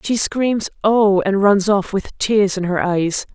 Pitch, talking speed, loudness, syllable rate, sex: 200 Hz, 195 wpm, -17 LUFS, 3.6 syllables/s, female